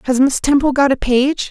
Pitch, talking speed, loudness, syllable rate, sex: 270 Hz, 240 wpm, -14 LUFS, 5.2 syllables/s, female